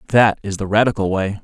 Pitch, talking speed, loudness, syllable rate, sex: 105 Hz, 210 wpm, -17 LUFS, 6.2 syllables/s, male